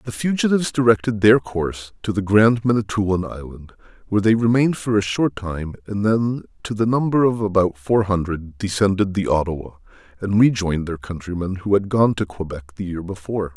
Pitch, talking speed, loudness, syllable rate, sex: 100 Hz, 180 wpm, -20 LUFS, 5.6 syllables/s, male